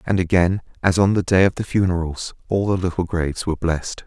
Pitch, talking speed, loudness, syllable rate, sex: 90 Hz, 220 wpm, -20 LUFS, 6.0 syllables/s, male